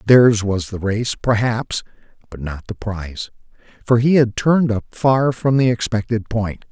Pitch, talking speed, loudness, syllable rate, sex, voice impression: 115 Hz, 170 wpm, -18 LUFS, 4.4 syllables/s, male, very masculine, very adult-like, cool, slightly intellectual, sincere, calm, slightly wild, slightly sweet